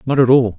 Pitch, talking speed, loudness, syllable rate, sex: 125 Hz, 310 wpm, -13 LUFS, 6.7 syllables/s, male